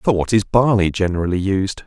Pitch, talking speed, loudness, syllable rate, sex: 100 Hz, 195 wpm, -18 LUFS, 5.5 syllables/s, male